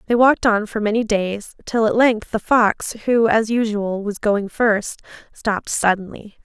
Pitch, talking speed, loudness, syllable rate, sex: 215 Hz, 175 wpm, -19 LUFS, 4.3 syllables/s, female